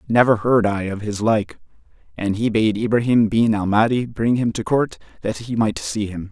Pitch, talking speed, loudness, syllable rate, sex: 110 Hz, 210 wpm, -19 LUFS, 4.9 syllables/s, male